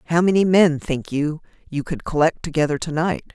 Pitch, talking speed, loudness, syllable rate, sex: 160 Hz, 200 wpm, -20 LUFS, 5.5 syllables/s, female